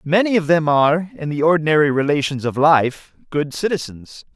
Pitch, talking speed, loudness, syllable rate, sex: 155 Hz, 165 wpm, -17 LUFS, 5.3 syllables/s, male